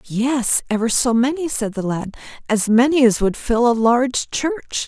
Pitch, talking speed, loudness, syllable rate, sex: 245 Hz, 185 wpm, -18 LUFS, 4.4 syllables/s, female